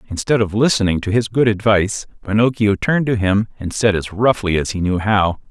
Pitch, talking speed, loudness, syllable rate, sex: 105 Hz, 205 wpm, -17 LUFS, 5.7 syllables/s, male